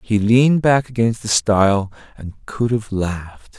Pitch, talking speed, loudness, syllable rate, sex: 110 Hz, 165 wpm, -17 LUFS, 4.3 syllables/s, male